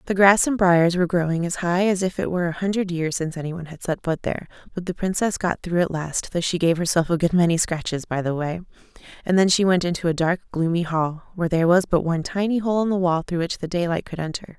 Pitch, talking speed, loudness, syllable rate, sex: 175 Hz, 265 wpm, -22 LUFS, 6.4 syllables/s, female